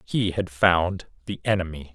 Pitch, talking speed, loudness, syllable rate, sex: 90 Hz, 155 wpm, -24 LUFS, 4.3 syllables/s, male